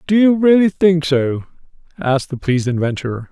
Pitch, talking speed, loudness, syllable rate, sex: 155 Hz, 165 wpm, -16 LUFS, 5.3 syllables/s, male